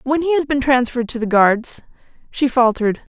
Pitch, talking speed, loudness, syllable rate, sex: 255 Hz, 190 wpm, -17 LUFS, 5.5 syllables/s, female